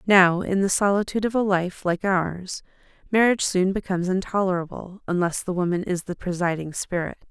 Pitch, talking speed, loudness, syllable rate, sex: 185 Hz, 165 wpm, -23 LUFS, 5.5 syllables/s, female